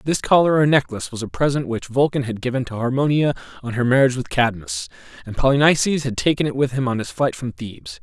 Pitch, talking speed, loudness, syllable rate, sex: 130 Hz, 225 wpm, -20 LUFS, 6.4 syllables/s, male